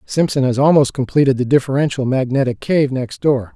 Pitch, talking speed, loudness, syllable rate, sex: 135 Hz, 170 wpm, -16 LUFS, 5.5 syllables/s, male